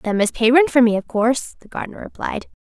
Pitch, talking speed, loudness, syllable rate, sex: 240 Hz, 245 wpm, -18 LUFS, 6.1 syllables/s, female